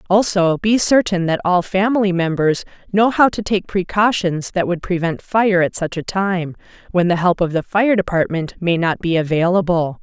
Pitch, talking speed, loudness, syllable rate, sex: 185 Hz, 185 wpm, -17 LUFS, 4.9 syllables/s, female